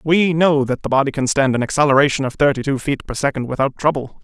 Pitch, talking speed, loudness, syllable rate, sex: 140 Hz, 240 wpm, -17 LUFS, 6.3 syllables/s, male